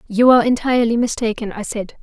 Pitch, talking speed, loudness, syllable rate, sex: 225 Hz, 180 wpm, -17 LUFS, 6.5 syllables/s, female